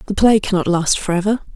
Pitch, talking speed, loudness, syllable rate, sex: 195 Hz, 195 wpm, -16 LUFS, 6.9 syllables/s, female